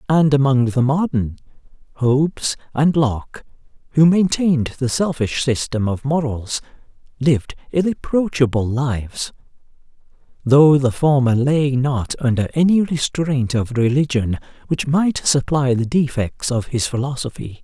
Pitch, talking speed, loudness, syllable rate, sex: 135 Hz, 120 wpm, -18 LUFS, 4.4 syllables/s, male